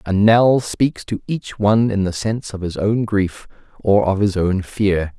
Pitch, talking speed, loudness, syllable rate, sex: 105 Hz, 210 wpm, -18 LUFS, 4.3 syllables/s, male